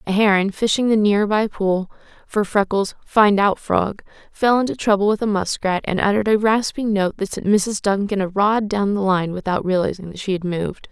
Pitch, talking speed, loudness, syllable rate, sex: 200 Hz, 210 wpm, -19 LUFS, 5.2 syllables/s, female